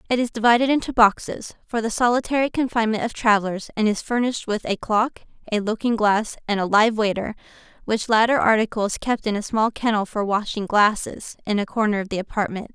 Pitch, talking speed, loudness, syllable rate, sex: 220 Hz, 200 wpm, -21 LUFS, 6.0 syllables/s, female